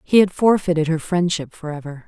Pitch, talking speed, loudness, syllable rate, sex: 170 Hz, 205 wpm, -19 LUFS, 5.6 syllables/s, female